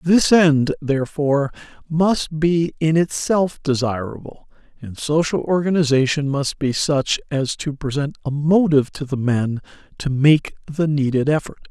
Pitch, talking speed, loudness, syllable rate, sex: 150 Hz, 140 wpm, -19 LUFS, 4.4 syllables/s, male